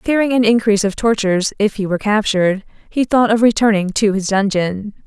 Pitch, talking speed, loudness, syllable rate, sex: 210 Hz, 190 wpm, -16 LUFS, 5.8 syllables/s, female